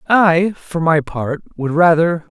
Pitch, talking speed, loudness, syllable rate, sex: 165 Hz, 155 wpm, -16 LUFS, 3.7 syllables/s, male